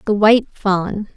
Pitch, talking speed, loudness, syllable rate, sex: 205 Hz, 155 wpm, -16 LUFS, 4.1 syllables/s, female